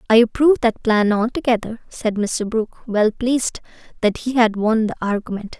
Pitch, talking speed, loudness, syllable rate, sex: 225 Hz, 170 wpm, -19 LUFS, 5.2 syllables/s, female